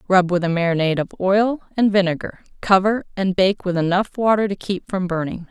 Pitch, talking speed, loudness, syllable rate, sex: 190 Hz, 195 wpm, -19 LUFS, 5.6 syllables/s, female